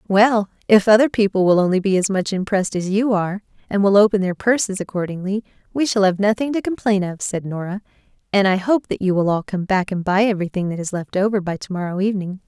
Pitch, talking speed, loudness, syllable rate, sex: 200 Hz, 230 wpm, -19 LUFS, 6.2 syllables/s, female